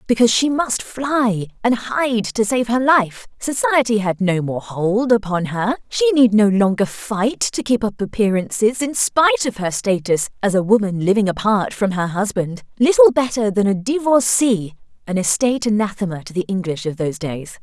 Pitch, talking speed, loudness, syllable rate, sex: 215 Hz, 175 wpm, -18 LUFS, 4.8 syllables/s, female